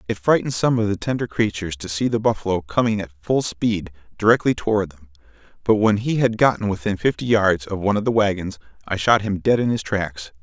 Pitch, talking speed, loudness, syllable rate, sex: 100 Hz, 220 wpm, -20 LUFS, 5.9 syllables/s, male